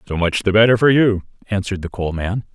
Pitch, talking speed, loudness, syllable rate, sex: 100 Hz, 235 wpm, -17 LUFS, 6.1 syllables/s, male